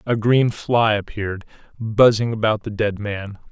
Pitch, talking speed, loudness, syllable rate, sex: 110 Hz, 155 wpm, -19 LUFS, 4.4 syllables/s, male